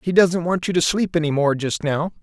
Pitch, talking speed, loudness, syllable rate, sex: 165 Hz, 270 wpm, -20 LUFS, 5.3 syllables/s, male